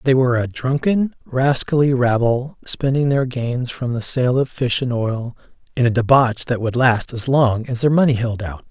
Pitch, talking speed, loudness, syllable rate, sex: 125 Hz, 200 wpm, -18 LUFS, 4.6 syllables/s, male